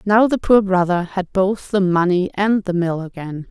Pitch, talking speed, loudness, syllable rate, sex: 190 Hz, 205 wpm, -18 LUFS, 4.5 syllables/s, female